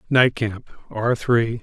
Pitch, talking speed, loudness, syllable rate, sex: 115 Hz, 150 wpm, -21 LUFS, 3.3 syllables/s, male